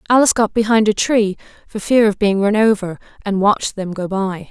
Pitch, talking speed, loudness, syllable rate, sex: 210 Hz, 215 wpm, -16 LUFS, 5.5 syllables/s, female